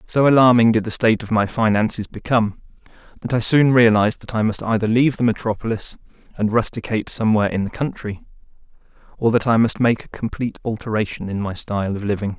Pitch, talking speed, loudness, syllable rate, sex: 110 Hz, 190 wpm, -19 LUFS, 6.5 syllables/s, male